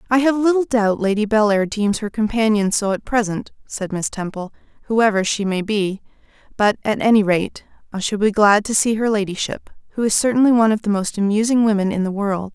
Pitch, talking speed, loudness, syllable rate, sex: 210 Hz, 205 wpm, -18 LUFS, 5.6 syllables/s, female